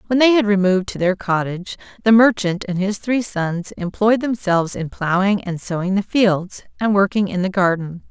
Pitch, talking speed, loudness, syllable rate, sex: 195 Hz, 190 wpm, -18 LUFS, 5.1 syllables/s, female